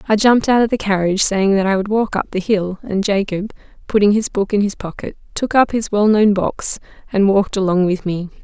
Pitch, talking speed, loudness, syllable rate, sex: 200 Hz, 230 wpm, -17 LUFS, 5.6 syllables/s, female